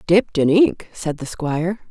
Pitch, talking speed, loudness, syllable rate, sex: 175 Hz, 190 wpm, -19 LUFS, 4.6 syllables/s, female